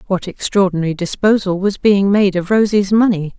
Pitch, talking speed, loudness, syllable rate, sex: 195 Hz, 160 wpm, -15 LUFS, 5.3 syllables/s, female